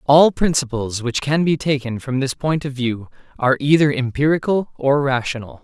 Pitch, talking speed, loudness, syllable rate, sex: 135 Hz, 170 wpm, -19 LUFS, 5.0 syllables/s, male